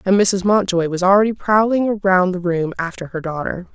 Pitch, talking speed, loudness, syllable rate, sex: 190 Hz, 190 wpm, -17 LUFS, 5.1 syllables/s, female